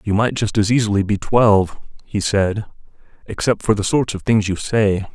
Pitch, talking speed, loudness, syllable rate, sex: 105 Hz, 200 wpm, -18 LUFS, 5.0 syllables/s, male